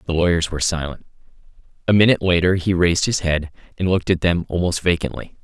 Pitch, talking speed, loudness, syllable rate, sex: 85 Hz, 190 wpm, -19 LUFS, 6.8 syllables/s, male